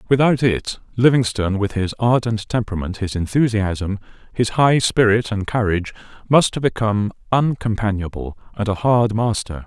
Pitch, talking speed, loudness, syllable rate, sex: 110 Hz, 135 wpm, -19 LUFS, 5.2 syllables/s, male